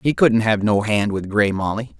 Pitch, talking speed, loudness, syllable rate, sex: 105 Hz, 240 wpm, -19 LUFS, 4.6 syllables/s, male